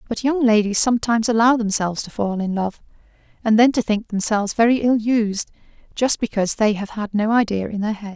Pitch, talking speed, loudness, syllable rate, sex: 220 Hz, 205 wpm, -19 LUFS, 5.9 syllables/s, female